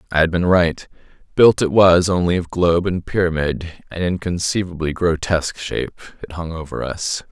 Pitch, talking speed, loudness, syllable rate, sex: 85 Hz, 155 wpm, -18 LUFS, 5.3 syllables/s, male